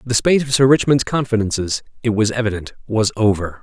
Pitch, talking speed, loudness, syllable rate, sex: 115 Hz, 180 wpm, -17 LUFS, 6.0 syllables/s, male